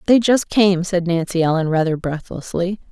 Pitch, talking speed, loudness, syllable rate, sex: 180 Hz, 165 wpm, -18 LUFS, 4.9 syllables/s, female